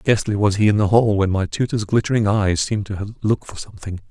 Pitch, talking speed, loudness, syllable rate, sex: 105 Hz, 235 wpm, -19 LUFS, 6.1 syllables/s, male